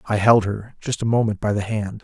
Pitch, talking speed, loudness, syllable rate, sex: 110 Hz, 265 wpm, -21 LUFS, 5.3 syllables/s, male